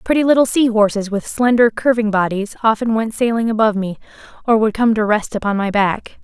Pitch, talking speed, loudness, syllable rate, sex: 220 Hz, 200 wpm, -16 LUFS, 5.7 syllables/s, female